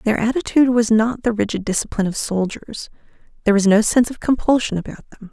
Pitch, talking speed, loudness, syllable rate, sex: 220 Hz, 190 wpm, -18 LUFS, 6.5 syllables/s, female